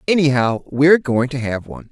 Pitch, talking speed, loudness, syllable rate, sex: 135 Hz, 190 wpm, -17 LUFS, 5.8 syllables/s, male